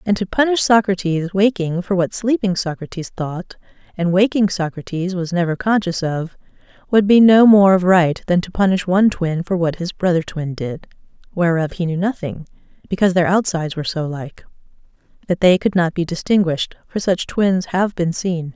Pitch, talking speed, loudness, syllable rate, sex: 180 Hz, 180 wpm, -17 LUFS, 5.2 syllables/s, female